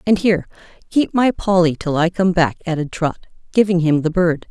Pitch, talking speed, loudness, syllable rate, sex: 175 Hz, 185 wpm, -17 LUFS, 5.5 syllables/s, female